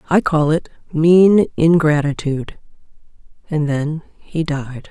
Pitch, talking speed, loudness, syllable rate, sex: 155 Hz, 110 wpm, -16 LUFS, 3.8 syllables/s, female